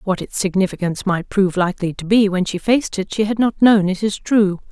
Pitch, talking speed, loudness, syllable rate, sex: 195 Hz, 240 wpm, -18 LUFS, 5.9 syllables/s, female